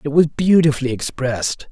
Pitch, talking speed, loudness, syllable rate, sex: 145 Hz, 140 wpm, -18 LUFS, 5.6 syllables/s, male